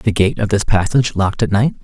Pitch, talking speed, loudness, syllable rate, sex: 105 Hz, 295 wpm, -16 LUFS, 6.9 syllables/s, male